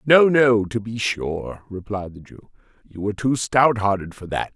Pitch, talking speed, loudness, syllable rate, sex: 110 Hz, 200 wpm, -21 LUFS, 4.4 syllables/s, male